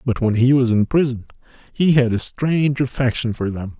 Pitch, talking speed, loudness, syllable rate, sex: 125 Hz, 205 wpm, -18 LUFS, 5.3 syllables/s, male